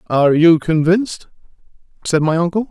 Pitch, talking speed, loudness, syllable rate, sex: 170 Hz, 135 wpm, -15 LUFS, 5.6 syllables/s, male